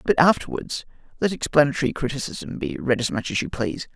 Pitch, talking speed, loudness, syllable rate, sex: 135 Hz, 180 wpm, -23 LUFS, 6.1 syllables/s, male